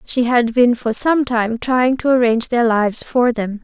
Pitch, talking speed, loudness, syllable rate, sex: 240 Hz, 215 wpm, -16 LUFS, 4.6 syllables/s, female